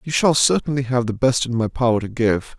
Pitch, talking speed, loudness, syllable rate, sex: 125 Hz, 255 wpm, -19 LUFS, 5.6 syllables/s, male